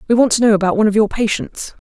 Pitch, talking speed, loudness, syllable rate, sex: 215 Hz, 290 wpm, -15 LUFS, 7.6 syllables/s, female